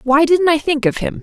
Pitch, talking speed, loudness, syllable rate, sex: 300 Hz, 295 wpm, -15 LUFS, 5.3 syllables/s, female